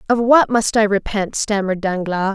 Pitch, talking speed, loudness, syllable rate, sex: 210 Hz, 180 wpm, -17 LUFS, 5.1 syllables/s, female